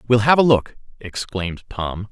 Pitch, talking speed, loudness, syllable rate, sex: 110 Hz, 170 wpm, -19 LUFS, 4.7 syllables/s, male